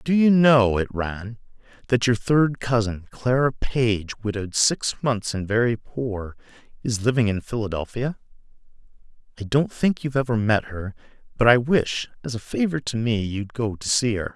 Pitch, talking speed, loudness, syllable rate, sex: 120 Hz, 170 wpm, -22 LUFS, 4.7 syllables/s, male